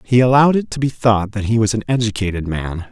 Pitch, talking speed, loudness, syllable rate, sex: 110 Hz, 245 wpm, -17 LUFS, 6.1 syllables/s, male